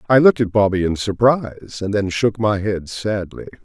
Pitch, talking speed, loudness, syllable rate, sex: 105 Hz, 200 wpm, -18 LUFS, 5.2 syllables/s, male